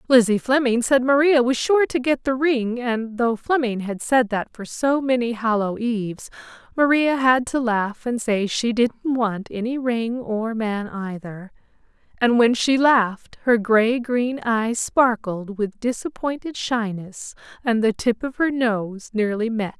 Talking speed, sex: 180 wpm, female